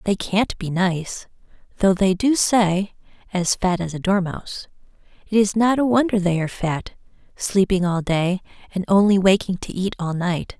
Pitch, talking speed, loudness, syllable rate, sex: 190 Hz, 175 wpm, -20 LUFS, 4.6 syllables/s, female